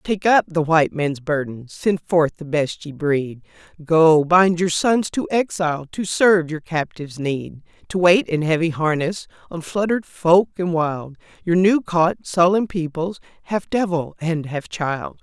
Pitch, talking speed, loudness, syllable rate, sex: 170 Hz, 170 wpm, -19 LUFS, 4.2 syllables/s, female